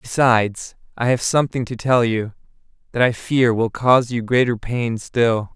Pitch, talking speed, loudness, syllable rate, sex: 120 Hz, 175 wpm, -19 LUFS, 4.7 syllables/s, male